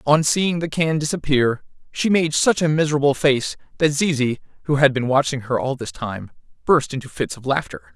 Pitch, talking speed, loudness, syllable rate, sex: 145 Hz, 195 wpm, -20 LUFS, 5.2 syllables/s, male